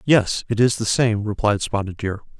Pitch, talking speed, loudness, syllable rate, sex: 105 Hz, 200 wpm, -21 LUFS, 4.8 syllables/s, male